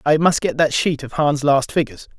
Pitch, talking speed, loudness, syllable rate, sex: 145 Hz, 245 wpm, -18 LUFS, 5.5 syllables/s, male